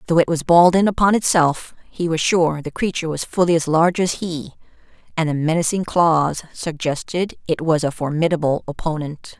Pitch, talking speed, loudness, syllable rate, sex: 165 Hz, 180 wpm, -19 LUFS, 5.4 syllables/s, female